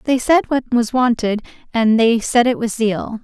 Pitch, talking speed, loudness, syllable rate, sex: 235 Hz, 205 wpm, -17 LUFS, 4.4 syllables/s, female